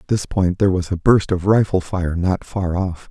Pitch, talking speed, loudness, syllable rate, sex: 90 Hz, 250 wpm, -19 LUFS, 4.9 syllables/s, male